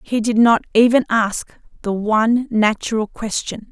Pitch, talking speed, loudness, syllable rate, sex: 220 Hz, 145 wpm, -17 LUFS, 4.4 syllables/s, female